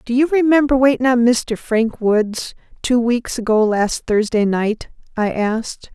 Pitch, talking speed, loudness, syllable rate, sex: 235 Hz, 160 wpm, -17 LUFS, 4.1 syllables/s, female